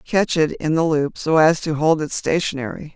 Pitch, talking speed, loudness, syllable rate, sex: 155 Hz, 225 wpm, -19 LUFS, 4.8 syllables/s, female